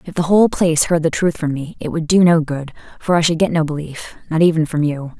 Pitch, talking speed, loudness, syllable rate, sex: 160 Hz, 265 wpm, -17 LUFS, 6.0 syllables/s, female